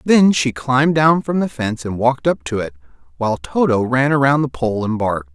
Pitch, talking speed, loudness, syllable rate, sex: 125 Hz, 225 wpm, -17 LUFS, 5.6 syllables/s, male